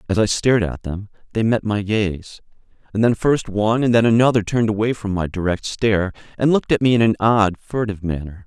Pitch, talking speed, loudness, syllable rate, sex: 105 Hz, 220 wpm, -19 LUFS, 6.0 syllables/s, male